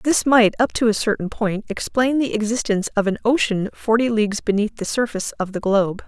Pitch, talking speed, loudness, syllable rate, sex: 220 Hz, 205 wpm, -20 LUFS, 5.8 syllables/s, female